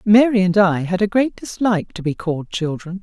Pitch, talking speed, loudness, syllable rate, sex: 190 Hz, 220 wpm, -18 LUFS, 5.5 syllables/s, female